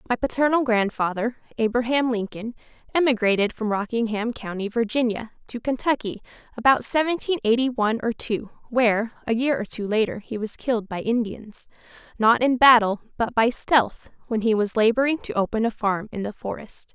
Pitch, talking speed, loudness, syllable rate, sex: 230 Hz, 160 wpm, -23 LUFS, 5.4 syllables/s, female